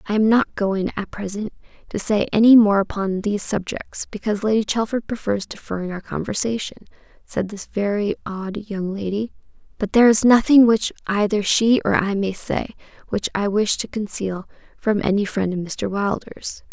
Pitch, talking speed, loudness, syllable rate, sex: 205 Hz, 170 wpm, -20 LUFS, 5.0 syllables/s, female